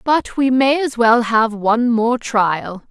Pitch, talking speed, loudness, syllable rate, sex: 235 Hz, 185 wpm, -16 LUFS, 3.6 syllables/s, female